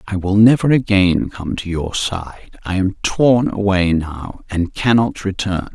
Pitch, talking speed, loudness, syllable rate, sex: 95 Hz, 165 wpm, -17 LUFS, 3.8 syllables/s, male